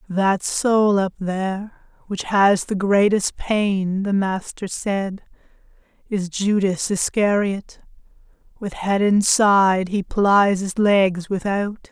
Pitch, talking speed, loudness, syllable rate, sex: 195 Hz, 115 wpm, -19 LUFS, 3.3 syllables/s, female